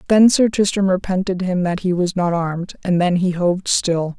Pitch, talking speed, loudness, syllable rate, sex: 185 Hz, 215 wpm, -18 LUFS, 5.1 syllables/s, female